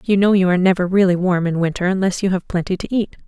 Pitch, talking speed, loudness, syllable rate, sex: 185 Hz, 275 wpm, -17 LUFS, 6.8 syllables/s, female